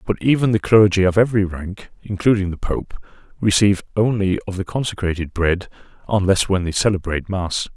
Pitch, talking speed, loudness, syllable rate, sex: 100 Hz, 160 wpm, -19 LUFS, 5.8 syllables/s, male